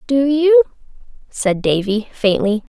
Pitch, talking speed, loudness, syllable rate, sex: 250 Hz, 105 wpm, -16 LUFS, 3.9 syllables/s, female